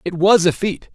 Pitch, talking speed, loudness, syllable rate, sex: 185 Hz, 255 wpm, -16 LUFS, 4.8 syllables/s, male